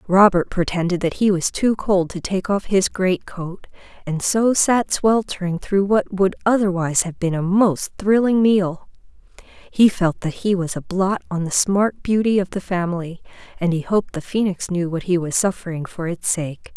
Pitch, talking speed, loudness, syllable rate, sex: 185 Hz, 195 wpm, -20 LUFS, 4.7 syllables/s, female